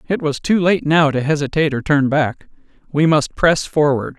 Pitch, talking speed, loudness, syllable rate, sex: 150 Hz, 200 wpm, -17 LUFS, 5.0 syllables/s, male